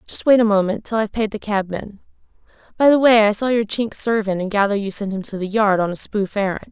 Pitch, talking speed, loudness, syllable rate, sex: 210 Hz, 250 wpm, -18 LUFS, 6.1 syllables/s, female